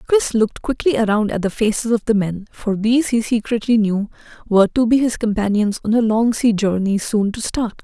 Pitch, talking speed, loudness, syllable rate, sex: 220 Hz, 215 wpm, -18 LUFS, 5.5 syllables/s, female